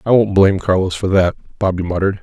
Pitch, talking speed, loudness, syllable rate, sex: 95 Hz, 215 wpm, -16 LUFS, 6.2 syllables/s, male